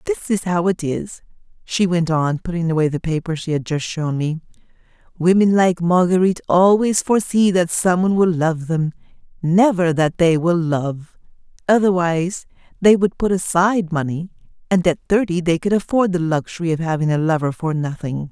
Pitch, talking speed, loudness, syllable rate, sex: 170 Hz, 175 wpm, -18 LUFS, 5.2 syllables/s, female